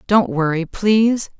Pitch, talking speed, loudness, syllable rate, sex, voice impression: 190 Hz, 130 wpm, -17 LUFS, 4.2 syllables/s, female, feminine, adult-like, clear, slightly intellectual, slightly calm